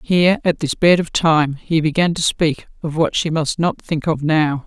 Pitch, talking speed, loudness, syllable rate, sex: 160 Hz, 230 wpm, -17 LUFS, 4.8 syllables/s, female